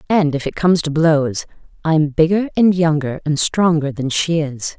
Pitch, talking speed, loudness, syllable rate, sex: 160 Hz, 190 wpm, -17 LUFS, 4.6 syllables/s, female